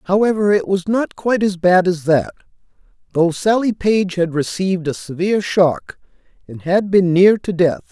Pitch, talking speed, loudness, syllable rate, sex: 185 Hz, 175 wpm, -16 LUFS, 4.8 syllables/s, male